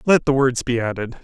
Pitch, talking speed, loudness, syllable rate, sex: 130 Hz, 245 wpm, -19 LUFS, 5.4 syllables/s, male